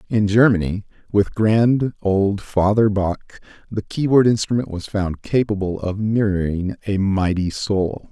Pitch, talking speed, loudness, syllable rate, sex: 100 Hz, 135 wpm, -19 LUFS, 4.2 syllables/s, male